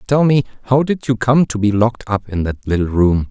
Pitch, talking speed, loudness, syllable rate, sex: 115 Hz, 255 wpm, -16 LUFS, 5.6 syllables/s, male